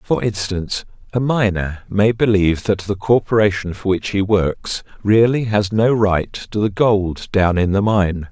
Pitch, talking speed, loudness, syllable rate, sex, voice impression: 100 Hz, 175 wpm, -17 LUFS, 4.3 syllables/s, male, very masculine, very adult-like, middle-aged, very thick, tensed, very powerful, bright, hard, very clear, fluent, slightly raspy, very cool, very intellectual, slightly refreshing, very sincere, very calm, mature, very friendly, very reassuring, unique, very elegant, slightly wild, very sweet, slightly lively, very kind, slightly modest